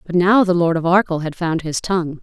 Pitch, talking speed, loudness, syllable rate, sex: 175 Hz, 270 wpm, -17 LUFS, 5.7 syllables/s, female